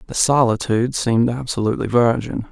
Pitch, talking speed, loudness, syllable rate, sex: 115 Hz, 120 wpm, -18 LUFS, 6.0 syllables/s, male